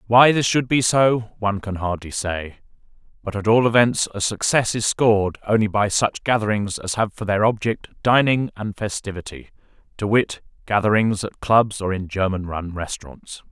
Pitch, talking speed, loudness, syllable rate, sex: 105 Hz, 170 wpm, -20 LUFS, 4.9 syllables/s, male